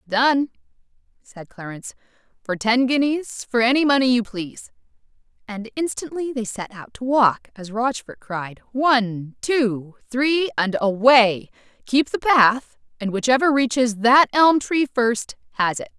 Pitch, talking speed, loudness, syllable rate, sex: 240 Hz, 140 wpm, -20 LUFS, 4.2 syllables/s, female